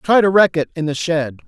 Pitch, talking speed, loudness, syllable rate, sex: 170 Hz, 285 wpm, -16 LUFS, 5.3 syllables/s, male